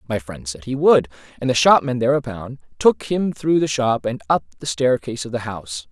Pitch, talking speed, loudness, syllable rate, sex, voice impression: 125 Hz, 215 wpm, -20 LUFS, 5.4 syllables/s, male, masculine, adult-like, tensed, slightly powerful, bright, clear, fluent, intellectual, friendly, slightly unique, lively, slightly sharp